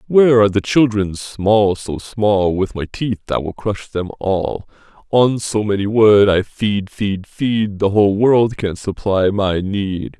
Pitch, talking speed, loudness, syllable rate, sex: 105 Hz, 175 wpm, -17 LUFS, 3.8 syllables/s, male